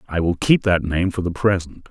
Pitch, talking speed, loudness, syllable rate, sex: 90 Hz, 250 wpm, -19 LUFS, 5.1 syllables/s, male